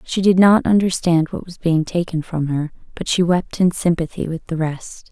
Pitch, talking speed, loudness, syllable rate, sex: 170 Hz, 210 wpm, -18 LUFS, 4.8 syllables/s, female